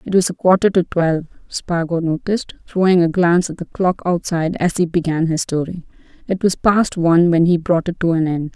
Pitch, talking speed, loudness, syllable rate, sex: 175 Hz, 215 wpm, -17 LUFS, 5.6 syllables/s, female